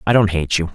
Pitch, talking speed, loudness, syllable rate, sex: 95 Hz, 320 wpm, -17 LUFS, 6.5 syllables/s, male